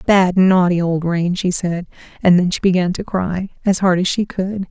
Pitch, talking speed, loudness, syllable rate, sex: 180 Hz, 215 wpm, -17 LUFS, 4.7 syllables/s, female